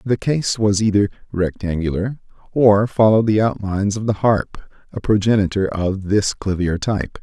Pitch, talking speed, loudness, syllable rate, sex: 105 Hz, 150 wpm, -18 LUFS, 4.9 syllables/s, male